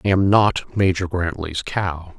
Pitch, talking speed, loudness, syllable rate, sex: 90 Hz, 165 wpm, -20 LUFS, 3.9 syllables/s, male